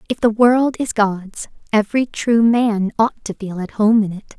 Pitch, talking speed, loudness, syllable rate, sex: 220 Hz, 205 wpm, -17 LUFS, 4.6 syllables/s, female